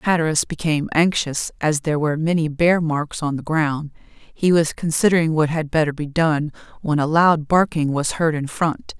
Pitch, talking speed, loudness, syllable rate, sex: 155 Hz, 185 wpm, -19 LUFS, 4.9 syllables/s, female